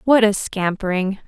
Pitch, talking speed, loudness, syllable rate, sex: 200 Hz, 140 wpm, -19 LUFS, 4.6 syllables/s, female